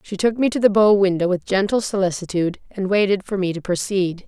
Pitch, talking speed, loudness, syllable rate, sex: 195 Hz, 225 wpm, -19 LUFS, 5.9 syllables/s, female